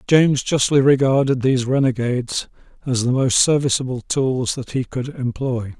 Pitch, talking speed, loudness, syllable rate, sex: 130 Hz, 145 wpm, -19 LUFS, 5.0 syllables/s, male